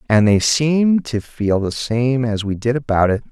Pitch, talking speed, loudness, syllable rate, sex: 120 Hz, 220 wpm, -17 LUFS, 4.6 syllables/s, male